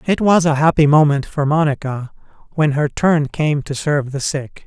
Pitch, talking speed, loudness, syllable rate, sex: 150 Hz, 195 wpm, -16 LUFS, 4.8 syllables/s, male